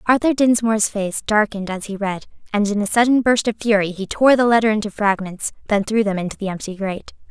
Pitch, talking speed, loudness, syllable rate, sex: 210 Hz, 220 wpm, -19 LUFS, 6.0 syllables/s, female